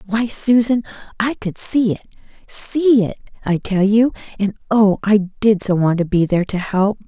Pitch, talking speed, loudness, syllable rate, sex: 210 Hz, 180 wpm, -17 LUFS, 4.5 syllables/s, female